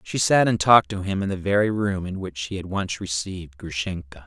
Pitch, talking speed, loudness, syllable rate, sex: 95 Hz, 240 wpm, -23 LUFS, 5.5 syllables/s, male